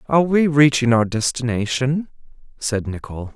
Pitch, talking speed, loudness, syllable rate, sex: 130 Hz, 125 wpm, -19 LUFS, 4.8 syllables/s, male